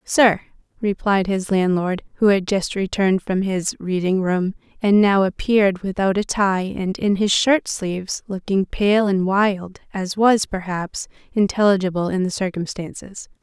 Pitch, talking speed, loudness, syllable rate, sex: 195 Hz, 150 wpm, -20 LUFS, 4.4 syllables/s, female